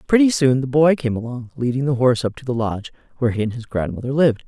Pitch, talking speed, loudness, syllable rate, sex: 130 Hz, 255 wpm, -19 LUFS, 7.0 syllables/s, female